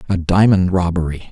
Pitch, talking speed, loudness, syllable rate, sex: 90 Hz, 135 wpm, -15 LUFS, 5.4 syllables/s, male